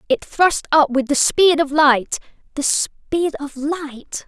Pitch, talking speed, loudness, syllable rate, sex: 295 Hz, 155 wpm, -17 LUFS, 3.8 syllables/s, female